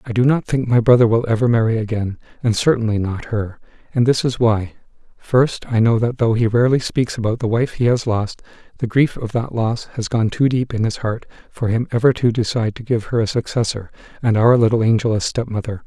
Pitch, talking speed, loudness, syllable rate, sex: 115 Hz, 225 wpm, -18 LUFS, 5.7 syllables/s, male